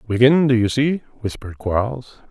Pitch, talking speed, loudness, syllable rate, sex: 120 Hz, 155 wpm, -19 LUFS, 5.2 syllables/s, male